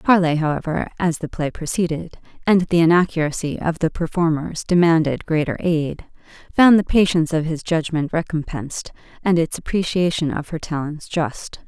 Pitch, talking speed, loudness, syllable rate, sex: 165 Hz, 150 wpm, -20 LUFS, 5.2 syllables/s, female